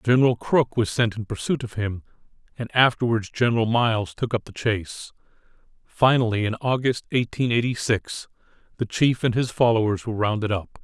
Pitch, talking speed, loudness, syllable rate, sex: 115 Hz, 165 wpm, -23 LUFS, 5.5 syllables/s, male